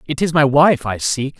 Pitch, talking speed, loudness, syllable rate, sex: 140 Hz, 255 wpm, -15 LUFS, 4.6 syllables/s, male